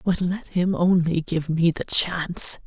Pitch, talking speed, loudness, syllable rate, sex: 175 Hz, 180 wpm, -22 LUFS, 4.0 syllables/s, female